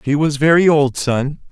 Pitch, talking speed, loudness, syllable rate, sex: 145 Hz, 200 wpm, -15 LUFS, 4.5 syllables/s, male